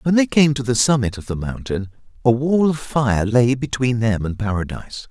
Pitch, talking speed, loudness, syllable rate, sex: 120 Hz, 210 wpm, -19 LUFS, 5.1 syllables/s, male